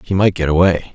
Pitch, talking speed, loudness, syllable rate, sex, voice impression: 90 Hz, 255 wpm, -15 LUFS, 5.9 syllables/s, male, very masculine, very adult-like, slightly old, very thick, tensed, very powerful, bright, soft, clear, very fluent, slightly raspy, very cool, very intellectual, very sincere, very calm, very mature, very friendly, very reassuring, unique, elegant, very wild, very sweet, lively, kind